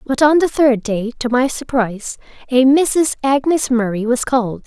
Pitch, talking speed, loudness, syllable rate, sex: 255 Hz, 180 wpm, -16 LUFS, 4.7 syllables/s, female